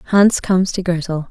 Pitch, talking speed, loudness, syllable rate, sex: 180 Hz, 185 wpm, -16 LUFS, 4.8 syllables/s, female